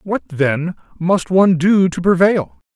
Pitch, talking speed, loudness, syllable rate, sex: 170 Hz, 150 wpm, -15 LUFS, 3.9 syllables/s, male